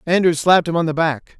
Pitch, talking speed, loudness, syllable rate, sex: 165 Hz, 260 wpm, -17 LUFS, 6.3 syllables/s, male